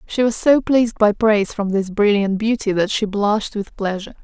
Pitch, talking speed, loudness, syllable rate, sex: 210 Hz, 215 wpm, -18 LUFS, 5.5 syllables/s, female